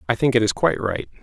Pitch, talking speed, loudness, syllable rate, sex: 120 Hz, 295 wpm, -20 LUFS, 7.4 syllables/s, male